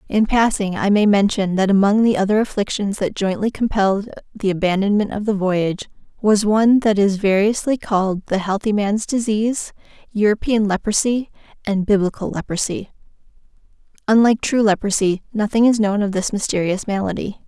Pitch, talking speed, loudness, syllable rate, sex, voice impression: 205 Hz, 150 wpm, -18 LUFS, 5.5 syllables/s, female, feminine, adult-like, slightly refreshing, friendly, slightly kind